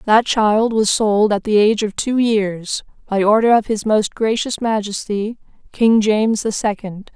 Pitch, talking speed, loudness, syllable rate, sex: 215 Hz, 175 wpm, -17 LUFS, 4.3 syllables/s, female